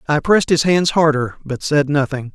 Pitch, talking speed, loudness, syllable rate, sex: 150 Hz, 205 wpm, -16 LUFS, 5.2 syllables/s, male